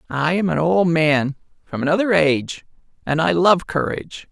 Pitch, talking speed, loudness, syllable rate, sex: 160 Hz, 165 wpm, -18 LUFS, 4.9 syllables/s, male